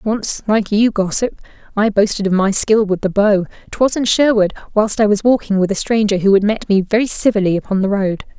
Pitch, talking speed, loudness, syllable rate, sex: 205 Hz, 215 wpm, -15 LUFS, 5.5 syllables/s, female